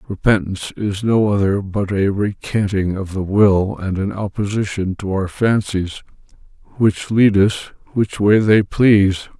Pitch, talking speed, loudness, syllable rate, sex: 100 Hz, 145 wpm, -17 LUFS, 4.2 syllables/s, male